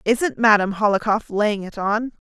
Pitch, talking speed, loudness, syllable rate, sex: 215 Hz, 160 wpm, -20 LUFS, 4.9 syllables/s, female